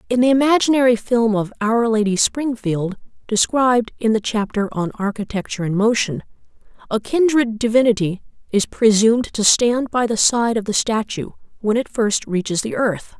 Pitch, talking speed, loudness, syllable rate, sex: 225 Hz, 160 wpm, -18 LUFS, 5.0 syllables/s, female